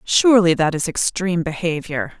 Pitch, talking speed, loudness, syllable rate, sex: 175 Hz, 135 wpm, -18 LUFS, 5.4 syllables/s, female